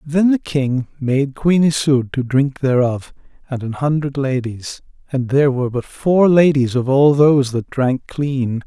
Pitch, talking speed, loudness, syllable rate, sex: 135 Hz, 175 wpm, -17 LUFS, 4.3 syllables/s, male